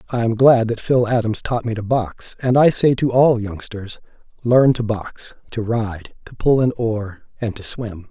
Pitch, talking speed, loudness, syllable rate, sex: 115 Hz, 205 wpm, -18 LUFS, 4.3 syllables/s, male